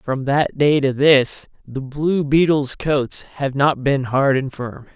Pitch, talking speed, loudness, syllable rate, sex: 140 Hz, 180 wpm, -18 LUFS, 3.4 syllables/s, male